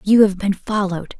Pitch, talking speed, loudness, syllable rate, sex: 200 Hz, 200 wpm, -18 LUFS, 5.5 syllables/s, female